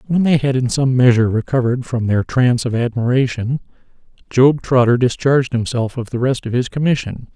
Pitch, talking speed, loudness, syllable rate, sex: 125 Hz, 180 wpm, -16 LUFS, 5.8 syllables/s, male